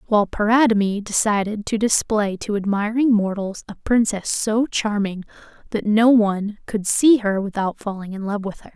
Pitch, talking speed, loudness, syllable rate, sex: 210 Hz, 165 wpm, -20 LUFS, 4.9 syllables/s, female